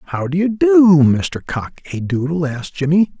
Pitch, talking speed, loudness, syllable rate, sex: 165 Hz, 190 wpm, -16 LUFS, 4.5 syllables/s, male